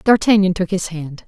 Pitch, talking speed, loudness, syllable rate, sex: 185 Hz, 190 wpm, -17 LUFS, 5.1 syllables/s, female